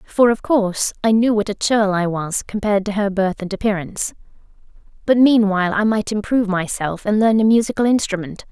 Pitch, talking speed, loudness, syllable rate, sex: 205 Hz, 190 wpm, -18 LUFS, 5.7 syllables/s, female